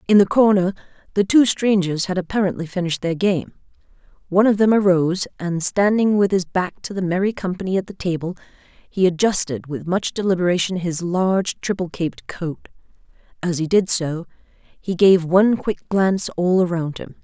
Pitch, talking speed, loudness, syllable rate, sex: 185 Hz, 170 wpm, -19 LUFS, 5.2 syllables/s, female